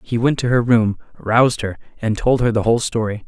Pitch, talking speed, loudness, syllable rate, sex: 115 Hz, 240 wpm, -18 LUFS, 5.7 syllables/s, male